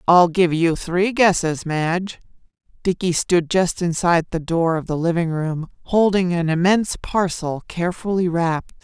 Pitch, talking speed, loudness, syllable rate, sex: 175 Hz, 150 wpm, -20 LUFS, 4.7 syllables/s, female